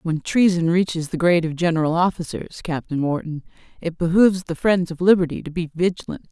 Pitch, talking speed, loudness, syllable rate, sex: 170 Hz, 180 wpm, -20 LUFS, 5.8 syllables/s, female